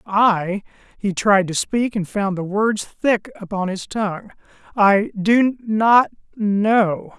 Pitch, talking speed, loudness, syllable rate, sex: 205 Hz, 125 wpm, -19 LUFS, 3.3 syllables/s, male